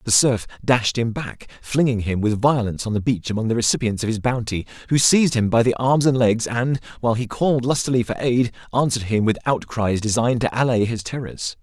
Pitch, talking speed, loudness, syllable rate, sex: 120 Hz, 215 wpm, -20 LUFS, 5.9 syllables/s, male